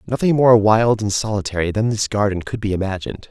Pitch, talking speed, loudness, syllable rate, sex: 105 Hz, 200 wpm, -18 LUFS, 6.0 syllables/s, male